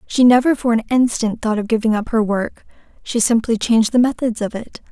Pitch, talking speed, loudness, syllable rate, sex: 230 Hz, 220 wpm, -17 LUFS, 5.6 syllables/s, female